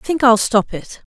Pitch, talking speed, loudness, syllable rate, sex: 235 Hz, 270 wpm, -15 LUFS, 5.0 syllables/s, female